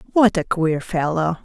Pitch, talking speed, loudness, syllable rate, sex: 175 Hz, 165 wpm, -20 LUFS, 4.5 syllables/s, female